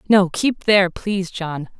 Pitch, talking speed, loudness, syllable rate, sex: 190 Hz, 165 wpm, -19 LUFS, 4.6 syllables/s, female